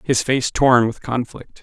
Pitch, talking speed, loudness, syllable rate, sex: 125 Hz, 185 wpm, -18 LUFS, 3.9 syllables/s, male